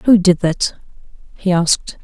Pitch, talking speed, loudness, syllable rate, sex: 180 Hz, 150 wpm, -16 LUFS, 4.2 syllables/s, female